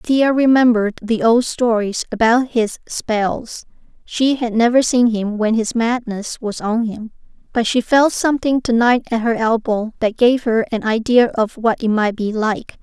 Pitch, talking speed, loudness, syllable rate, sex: 230 Hz, 180 wpm, -17 LUFS, 4.3 syllables/s, female